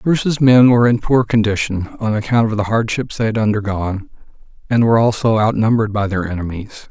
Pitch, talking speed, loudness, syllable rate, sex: 110 Hz, 180 wpm, -16 LUFS, 6.2 syllables/s, male